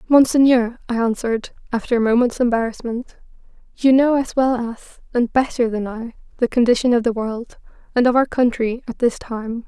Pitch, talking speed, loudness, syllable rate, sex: 240 Hz, 175 wpm, -19 LUFS, 5.3 syllables/s, female